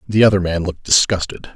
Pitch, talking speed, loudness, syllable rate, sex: 95 Hz, 195 wpm, -16 LUFS, 6.5 syllables/s, male